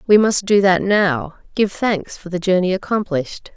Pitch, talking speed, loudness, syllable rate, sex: 190 Hz, 170 wpm, -18 LUFS, 4.6 syllables/s, female